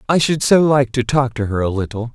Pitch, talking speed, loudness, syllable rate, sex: 125 Hz, 280 wpm, -17 LUFS, 5.6 syllables/s, male